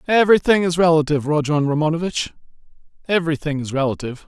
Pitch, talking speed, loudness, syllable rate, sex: 160 Hz, 110 wpm, -18 LUFS, 7.0 syllables/s, male